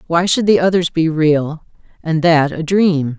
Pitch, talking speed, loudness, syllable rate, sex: 165 Hz, 190 wpm, -15 LUFS, 4.1 syllables/s, female